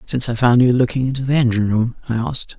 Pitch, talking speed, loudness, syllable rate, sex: 120 Hz, 255 wpm, -17 LUFS, 7.2 syllables/s, male